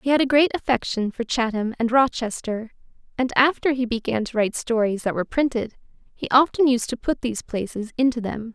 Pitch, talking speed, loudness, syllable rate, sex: 240 Hz, 195 wpm, -22 LUFS, 5.8 syllables/s, female